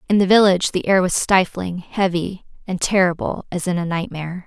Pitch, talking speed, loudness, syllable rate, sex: 185 Hz, 190 wpm, -19 LUFS, 5.5 syllables/s, female